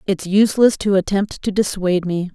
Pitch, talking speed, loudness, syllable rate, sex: 195 Hz, 180 wpm, -18 LUFS, 5.5 syllables/s, female